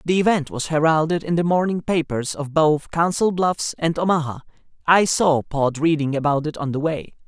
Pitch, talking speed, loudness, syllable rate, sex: 160 Hz, 190 wpm, -20 LUFS, 5.1 syllables/s, male